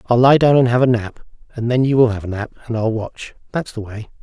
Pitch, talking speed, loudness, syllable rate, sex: 120 Hz, 270 wpm, -17 LUFS, 5.9 syllables/s, male